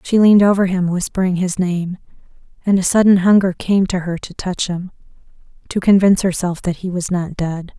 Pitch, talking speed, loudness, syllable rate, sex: 185 Hz, 195 wpm, -16 LUFS, 5.5 syllables/s, female